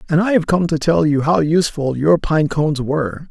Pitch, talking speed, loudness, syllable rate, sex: 160 Hz, 235 wpm, -16 LUFS, 5.6 syllables/s, male